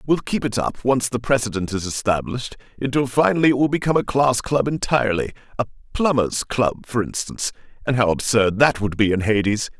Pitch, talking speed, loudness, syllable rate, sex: 120 Hz, 180 wpm, -20 LUFS, 5.8 syllables/s, male